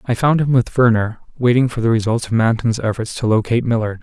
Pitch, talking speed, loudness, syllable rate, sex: 115 Hz, 225 wpm, -17 LUFS, 6.2 syllables/s, male